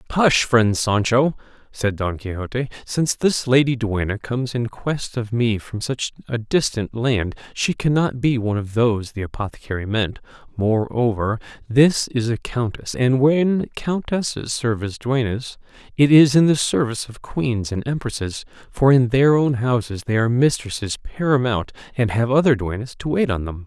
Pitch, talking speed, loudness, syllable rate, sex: 120 Hz, 165 wpm, -20 LUFS, 4.8 syllables/s, male